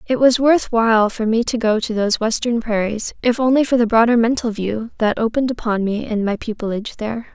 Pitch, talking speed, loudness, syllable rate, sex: 225 Hz, 220 wpm, -18 LUFS, 5.9 syllables/s, female